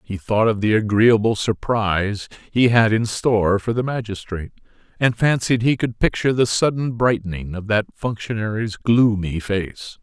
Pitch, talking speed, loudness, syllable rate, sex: 110 Hz, 155 wpm, -20 LUFS, 4.8 syllables/s, male